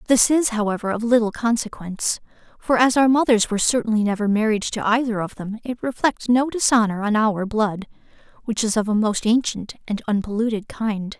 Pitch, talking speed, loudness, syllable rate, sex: 220 Hz, 180 wpm, -20 LUFS, 5.5 syllables/s, female